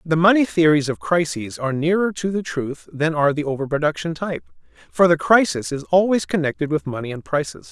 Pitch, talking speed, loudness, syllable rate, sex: 155 Hz, 200 wpm, -20 LUFS, 5.9 syllables/s, male